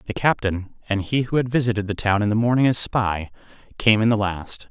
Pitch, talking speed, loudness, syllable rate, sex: 110 Hz, 230 wpm, -21 LUFS, 5.6 syllables/s, male